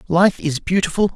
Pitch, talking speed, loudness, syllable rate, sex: 180 Hz, 155 wpm, -18 LUFS, 5.2 syllables/s, male